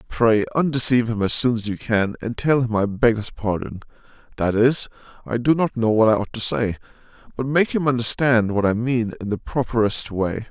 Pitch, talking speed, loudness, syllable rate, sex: 115 Hz, 195 wpm, -20 LUFS, 5.3 syllables/s, male